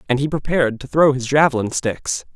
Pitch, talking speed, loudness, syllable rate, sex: 135 Hz, 205 wpm, -18 LUFS, 5.7 syllables/s, male